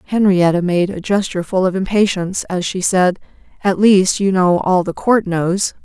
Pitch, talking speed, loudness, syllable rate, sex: 185 Hz, 185 wpm, -16 LUFS, 4.9 syllables/s, female